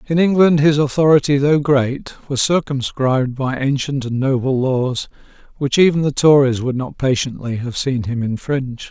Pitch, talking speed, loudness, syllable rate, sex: 135 Hz, 160 wpm, -17 LUFS, 4.7 syllables/s, male